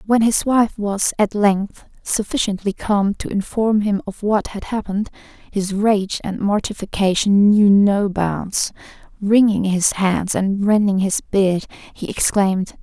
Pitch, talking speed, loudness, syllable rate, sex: 205 Hz, 145 wpm, -18 LUFS, 4.0 syllables/s, female